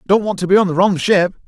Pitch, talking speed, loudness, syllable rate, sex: 190 Hz, 365 wpm, -15 LUFS, 7.0 syllables/s, male